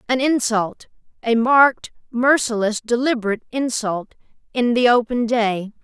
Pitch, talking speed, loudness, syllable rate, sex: 235 Hz, 105 wpm, -19 LUFS, 4.6 syllables/s, female